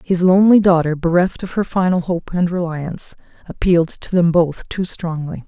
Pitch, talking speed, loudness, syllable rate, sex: 175 Hz, 175 wpm, -17 LUFS, 5.2 syllables/s, female